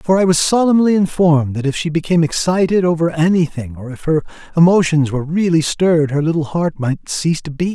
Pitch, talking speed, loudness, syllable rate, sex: 165 Hz, 200 wpm, -15 LUFS, 6.0 syllables/s, male